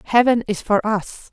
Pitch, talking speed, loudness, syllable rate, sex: 215 Hz, 180 wpm, -19 LUFS, 4.4 syllables/s, female